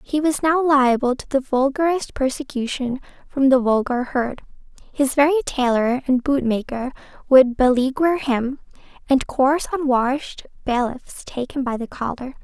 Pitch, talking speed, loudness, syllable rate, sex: 265 Hz, 140 wpm, -20 LUFS, 4.7 syllables/s, female